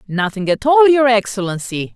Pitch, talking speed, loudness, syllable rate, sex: 225 Hz, 155 wpm, -15 LUFS, 5.0 syllables/s, female